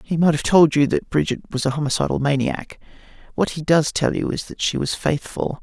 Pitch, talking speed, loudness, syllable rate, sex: 145 Hz, 225 wpm, -20 LUFS, 5.5 syllables/s, male